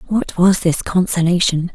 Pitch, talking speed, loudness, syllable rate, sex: 180 Hz, 135 wpm, -16 LUFS, 4.5 syllables/s, female